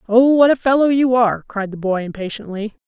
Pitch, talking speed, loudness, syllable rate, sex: 230 Hz, 210 wpm, -17 LUFS, 5.8 syllables/s, female